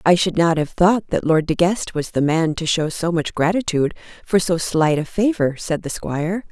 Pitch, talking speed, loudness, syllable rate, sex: 170 Hz, 230 wpm, -19 LUFS, 5.0 syllables/s, female